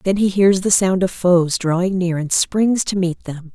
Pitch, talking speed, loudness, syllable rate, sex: 185 Hz, 235 wpm, -17 LUFS, 4.4 syllables/s, female